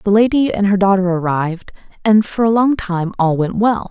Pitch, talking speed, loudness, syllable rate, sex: 200 Hz, 215 wpm, -15 LUFS, 5.2 syllables/s, female